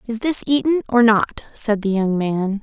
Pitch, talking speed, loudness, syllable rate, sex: 225 Hz, 205 wpm, -18 LUFS, 4.4 syllables/s, female